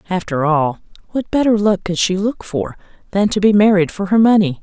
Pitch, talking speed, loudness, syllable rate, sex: 195 Hz, 210 wpm, -16 LUFS, 5.4 syllables/s, female